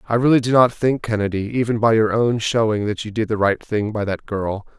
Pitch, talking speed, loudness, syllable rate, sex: 110 Hz, 250 wpm, -19 LUFS, 5.5 syllables/s, male